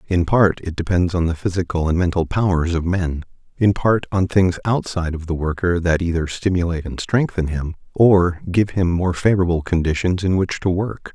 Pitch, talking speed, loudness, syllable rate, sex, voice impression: 90 Hz, 195 wpm, -19 LUFS, 5.3 syllables/s, male, masculine, middle-aged, thick, slightly powerful, clear, fluent, cool, intellectual, calm, friendly, reassuring, wild, kind